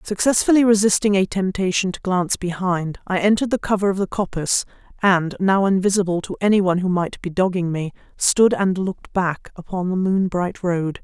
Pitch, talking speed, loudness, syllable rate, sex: 190 Hz, 185 wpm, -20 LUFS, 5.5 syllables/s, female